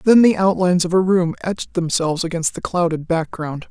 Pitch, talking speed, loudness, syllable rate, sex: 175 Hz, 195 wpm, -18 LUFS, 5.7 syllables/s, female